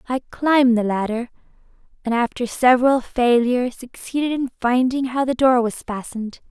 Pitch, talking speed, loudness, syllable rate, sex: 245 Hz, 150 wpm, -19 LUFS, 5.2 syllables/s, female